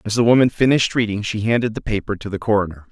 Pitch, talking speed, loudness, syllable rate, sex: 110 Hz, 245 wpm, -18 LUFS, 7.2 syllables/s, male